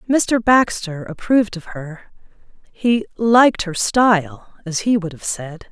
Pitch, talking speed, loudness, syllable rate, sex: 200 Hz, 145 wpm, -17 LUFS, 4.1 syllables/s, female